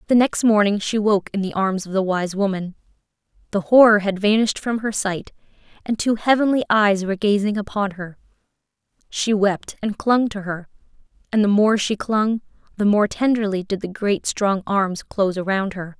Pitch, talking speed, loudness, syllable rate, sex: 205 Hz, 185 wpm, -20 LUFS, 5.1 syllables/s, female